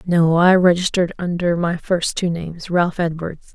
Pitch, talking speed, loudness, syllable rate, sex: 170 Hz, 150 wpm, -18 LUFS, 4.7 syllables/s, female